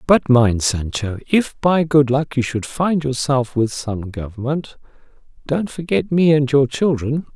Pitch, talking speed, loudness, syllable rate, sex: 140 Hz, 165 wpm, -18 LUFS, 4.1 syllables/s, male